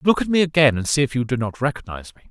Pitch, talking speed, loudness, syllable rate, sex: 140 Hz, 310 wpm, -19 LUFS, 7.5 syllables/s, male